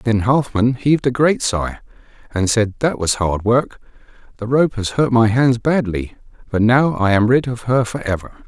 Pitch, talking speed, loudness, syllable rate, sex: 120 Hz, 200 wpm, -17 LUFS, 4.7 syllables/s, male